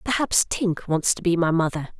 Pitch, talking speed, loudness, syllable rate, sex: 180 Hz, 210 wpm, -22 LUFS, 4.8 syllables/s, female